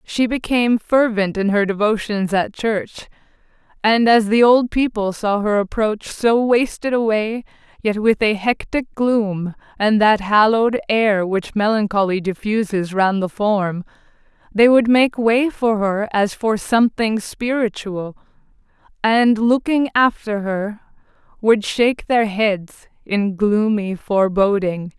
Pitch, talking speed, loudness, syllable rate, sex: 215 Hz, 130 wpm, -18 LUFS, 4.0 syllables/s, female